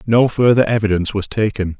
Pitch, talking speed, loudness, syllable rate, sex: 105 Hz, 165 wpm, -16 LUFS, 6.0 syllables/s, male